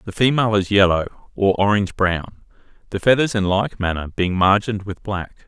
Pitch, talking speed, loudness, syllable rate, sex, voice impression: 100 Hz, 175 wpm, -19 LUFS, 5.2 syllables/s, male, masculine, adult-like, thick, tensed, slightly powerful, slightly muffled, fluent, cool, intellectual, calm, reassuring, wild, lively, slightly strict